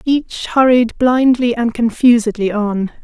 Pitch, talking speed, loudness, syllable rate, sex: 235 Hz, 120 wpm, -14 LUFS, 4.0 syllables/s, female